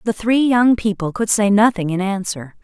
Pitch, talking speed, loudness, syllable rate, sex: 210 Hz, 205 wpm, -17 LUFS, 4.9 syllables/s, female